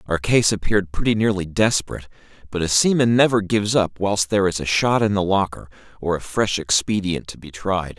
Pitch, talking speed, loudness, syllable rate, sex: 100 Hz, 205 wpm, -20 LUFS, 5.8 syllables/s, male